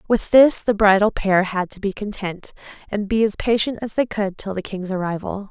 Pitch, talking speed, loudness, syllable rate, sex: 205 Hz, 220 wpm, -20 LUFS, 5.0 syllables/s, female